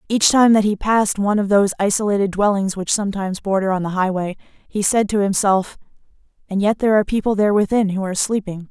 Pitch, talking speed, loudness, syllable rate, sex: 200 Hz, 205 wpm, -18 LUFS, 6.6 syllables/s, female